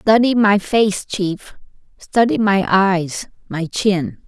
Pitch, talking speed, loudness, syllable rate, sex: 200 Hz, 110 wpm, -17 LUFS, 3.0 syllables/s, female